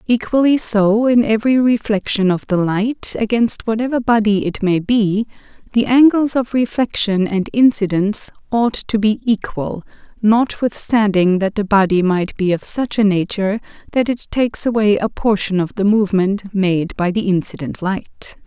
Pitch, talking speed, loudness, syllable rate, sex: 210 Hz, 155 wpm, -16 LUFS, 4.7 syllables/s, female